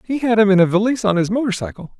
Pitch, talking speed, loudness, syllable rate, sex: 205 Hz, 300 wpm, -17 LUFS, 7.6 syllables/s, male